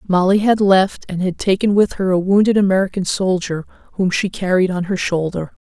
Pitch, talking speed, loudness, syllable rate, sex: 190 Hz, 190 wpm, -17 LUFS, 5.3 syllables/s, female